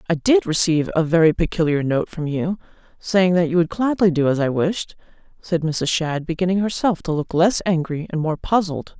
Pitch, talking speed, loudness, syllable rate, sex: 170 Hz, 200 wpm, -20 LUFS, 5.2 syllables/s, female